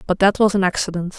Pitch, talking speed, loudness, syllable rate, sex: 190 Hz, 255 wpm, -18 LUFS, 6.7 syllables/s, female